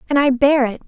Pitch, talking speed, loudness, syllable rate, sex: 265 Hz, 275 wpm, -16 LUFS, 6.0 syllables/s, female